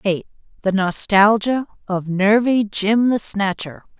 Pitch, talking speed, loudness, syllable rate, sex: 205 Hz, 120 wpm, -18 LUFS, 3.7 syllables/s, female